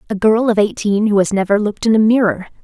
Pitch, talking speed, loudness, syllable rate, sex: 210 Hz, 250 wpm, -15 LUFS, 6.6 syllables/s, female